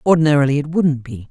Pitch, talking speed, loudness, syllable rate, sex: 145 Hz, 185 wpm, -16 LUFS, 6.6 syllables/s, female